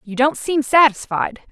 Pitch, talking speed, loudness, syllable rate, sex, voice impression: 265 Hz, 160 wpm, -17 LUFS, 4.3 syllables/s, female, feminine, slightly young, tensed, slightly bright, clear, fluent, slightly cute, slightly intellectual, slightly elegant, lively, slightly sharp